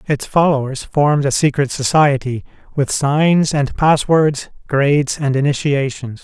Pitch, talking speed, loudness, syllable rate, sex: 140 Hz, 125 wpm, -16 LUFS, 4.3 syllables/s, male